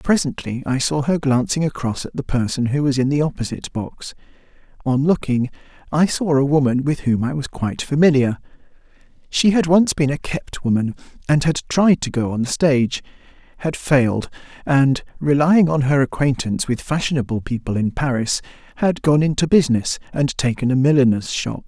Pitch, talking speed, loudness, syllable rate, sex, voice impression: 140 Hz, 175 wpm, -19 LUFS, 5.4 syllables/s, male, masculine, adult-like, refreshing, slightly calm, friendly, slightly kind